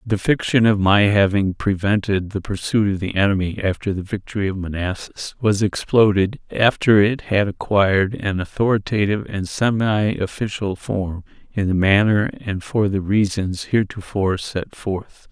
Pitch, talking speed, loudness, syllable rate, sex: 100 Hz, 150 wpm, -19 LUFS, 4.7 syllables/s, male